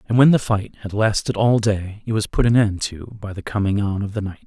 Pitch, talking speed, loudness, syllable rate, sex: 105 Hz, 280 wpm, -20 LUFS, 5.6 syllables/s, male